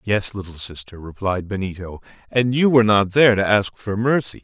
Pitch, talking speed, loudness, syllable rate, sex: 105 Hz, 190 wpm, -19 LUFS, 5.4 syllables/s, male